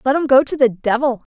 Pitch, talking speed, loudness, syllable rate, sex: 260 Hz, 265 wpm, -16 LUFS, 6.0 syllables/s, female